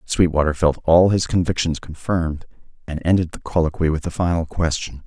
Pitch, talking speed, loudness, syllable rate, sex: 85 Hz, 165 wpm, -20 LUFS, 5.5 syllables/s, male